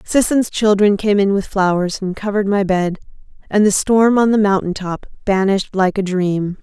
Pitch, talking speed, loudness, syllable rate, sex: 200 Hz, 180 wpm, -16 LUFS, 5.0 syllables/s, female